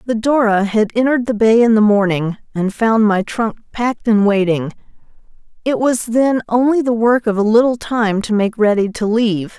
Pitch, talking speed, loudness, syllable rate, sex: 220 Hz, 195 wpm, -15 LUFS, 5.0 syllables/s, female